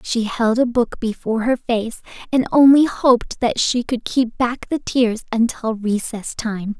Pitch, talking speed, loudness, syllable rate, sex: 235 Hz, 175 wpm, -18 LUFS, 4.2 syllables/s, female